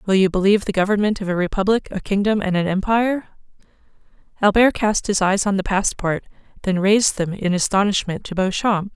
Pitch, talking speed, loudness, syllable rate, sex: 195 Hz, 180 wpm, -19 LUFS, 5.9 syllables/s, female